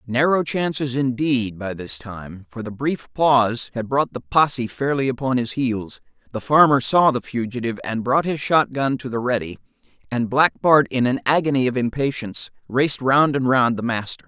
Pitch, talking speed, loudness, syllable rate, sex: 125 Hz, 185 wpm, -20 LUFS, 5.0 syllables/s, male